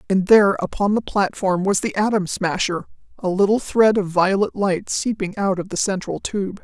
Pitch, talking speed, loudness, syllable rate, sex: 195 Hz, 190 wpm, -20 LUFS, 4.9 syllables/s, female